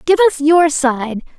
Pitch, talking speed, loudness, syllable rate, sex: 300 Hz, 175 wpm, -13 LUFS, 4.0 syllables/s, female